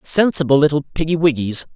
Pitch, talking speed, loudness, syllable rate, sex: 150 Hz, 105 wpm, -17 LUFS, 6.1 syllables/s, male